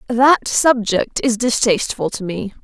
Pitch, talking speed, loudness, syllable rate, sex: 225 Hz, 135 wpm, -17 LUFS, 4.3 syllables/s, female